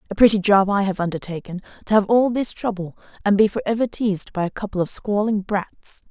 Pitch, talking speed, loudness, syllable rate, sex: 205 Hz, 215 wpm, -20 LUFS, 5.9 syllables/s, female